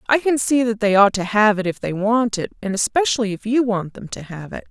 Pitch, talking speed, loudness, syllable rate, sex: 215 Hz, 280 wpm, -18 LUFS, 5.7 syllables/s, female